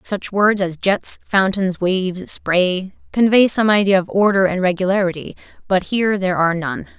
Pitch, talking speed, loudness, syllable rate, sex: 190 Hz, 165 wpm, -17 LUFS, 4.9 syllables/s, female